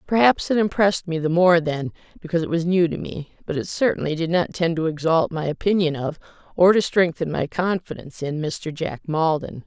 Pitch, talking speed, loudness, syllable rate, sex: 165 Hz, 205 wpm, -21 LUFS, 5.5 syllables/s, female